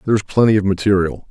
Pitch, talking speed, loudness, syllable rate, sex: 100 Hz, 230 wpm, -16 LUFS, 7.7 syllables/s, male